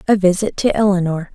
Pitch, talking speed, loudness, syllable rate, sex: 190 Hz, 180 wpm, -16 LUFS, 5.9 syllables/s, female